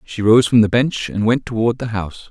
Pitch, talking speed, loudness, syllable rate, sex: 115 Hz, 260 wpm, -16 LUFS, 5.6 syllables/s, male